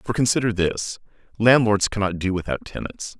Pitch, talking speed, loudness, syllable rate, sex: 105 Hz, 150 wpm, -21 LUFS, 5.2 syllables/s, male